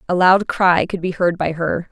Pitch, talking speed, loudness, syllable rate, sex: 175 Hz, 250 wpm, -17 LUFS, 4.6 syllables/s, female